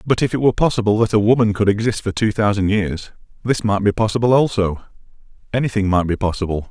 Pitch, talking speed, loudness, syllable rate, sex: 105 Hz, 195 wpm, -18 LUFS, 6.5 syllables/s, male